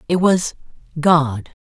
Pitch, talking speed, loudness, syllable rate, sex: 160 Hz, 110 wpm, -17 LUFS, 3.2 syllables/s, male